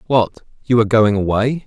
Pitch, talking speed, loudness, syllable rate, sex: 115 Hz, 180 wpm, -16 LUFS, 5.2 syllables/s, male